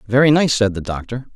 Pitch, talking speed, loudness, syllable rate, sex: 120 Hz, 220 wpm, -17 LUFS, 6.2 syllables/s, male